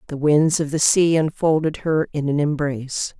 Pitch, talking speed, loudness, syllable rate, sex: 150 Hz, 190 wpm, -19 LUFS, 4.8 syllables/s, female